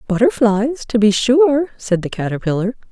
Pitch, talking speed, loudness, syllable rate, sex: 230 Hz, 145 wpm, -16 LUFS, 4.7 syllables/s, female